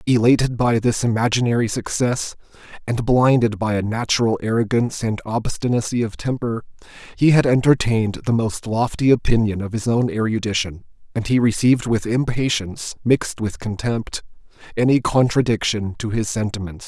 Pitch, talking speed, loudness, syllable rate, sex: 115 Hz, 140 wpm, -20 LUFS, 5.3 syllables/s, male